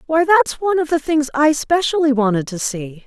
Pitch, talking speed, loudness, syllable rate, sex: 285 Hz, 215 wpm, -17 LUFS, 5.2 syllables/s, female